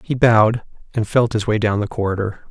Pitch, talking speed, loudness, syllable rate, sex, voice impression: 110 Hz, 215 wpm, -18 LUFS, 5.8 syllables/s, male, very masculine, very adult-like, very thick, very tensed, very powerful, bright, soft, slightly muffled, fluent, slightly raspy, cool, intellectual, slightly refreshing, sincere, very calm, very mature, very friendly, very reassuring, very unique, elegant, wild, very sweet, slightly lively, kind, slightly modest